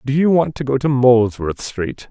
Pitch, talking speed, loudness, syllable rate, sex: 130 Hz, 230 wpm, -17 LUFS, 5.0 syllables/s, male